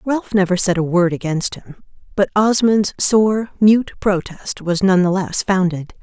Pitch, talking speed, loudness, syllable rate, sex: 190 Hz, 170 wpm, -17 LUFS, 4.2 syllables/s, female